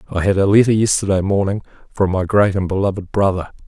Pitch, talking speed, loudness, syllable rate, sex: 100 Hz, 195 wpm, -17 LUFS, 6.4 syllables/s, male